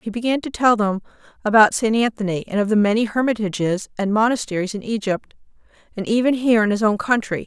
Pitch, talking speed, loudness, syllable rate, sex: 215 Hz, 195 wpm, -19 LUFS, 6.1 syllables/s, female